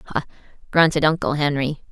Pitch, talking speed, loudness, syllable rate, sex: 150 Hz, 125 wpm, -20 LUFS, 6.8 syllables/s, female